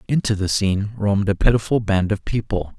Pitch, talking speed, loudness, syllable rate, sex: 105 Hz, 195 wpm, -20 LUFS, 5.8 syllables/s, male